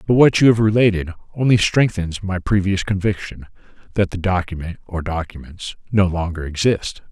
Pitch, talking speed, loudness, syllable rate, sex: 95 Hz, 150 wpm, -19 LUFS, 5.2 syllables/s, male